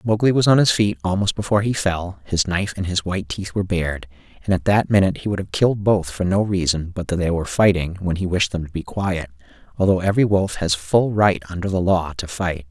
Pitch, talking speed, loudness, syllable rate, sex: 90 Hz, 245 wpm, -20 LUFS, 6.1 syllables/s, male